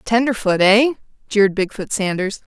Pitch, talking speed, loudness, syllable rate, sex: 210 Hz, 140 wpm, -17 LUFS, 5.1 syllables/s, female